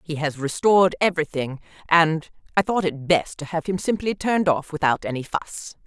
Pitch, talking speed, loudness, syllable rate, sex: 165 Hz, 185 wpm, -22 LUFS, 5.3 syllables/s, female